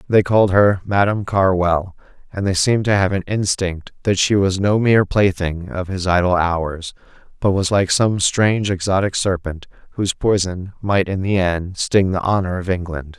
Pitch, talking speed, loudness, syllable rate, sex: 95 Hz, 180 wpm, -18 LUFS, 4.8 syllables/s, male